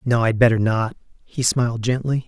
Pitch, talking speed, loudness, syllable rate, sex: 120 Hz, 185 wpm, -20 LUFS, 5.3 syllables/s, male